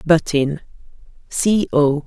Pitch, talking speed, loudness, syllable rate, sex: 160 Hz, 115 wpm, -18 LUFS, 3.2 syllables/s, female